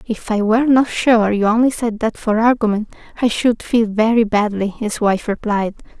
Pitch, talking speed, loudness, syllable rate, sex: 220 Hz, 190 wpm, -17 LUFS, 4.9 syllables/s, female